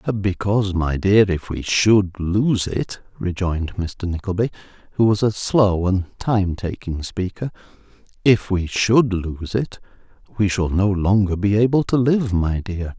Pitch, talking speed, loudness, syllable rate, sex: 100 Hz, 155 wpm, -20 LUFS, 4.1 syllables/s, male